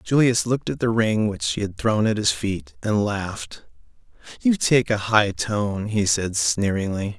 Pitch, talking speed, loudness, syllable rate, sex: 105 Hz, 185 wpm, -22 LUFS, 4.3 syllables/s, male